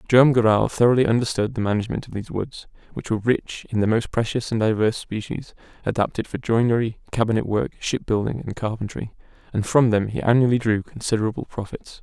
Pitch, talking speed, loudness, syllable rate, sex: 115 Hz, 180 wpm, -22 LUFS, 6.2 syllables/s, male